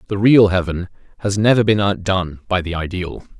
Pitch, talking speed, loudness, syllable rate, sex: 95 Hz, 175 wpm, -17 LUFS, 5.6 syllables/s, male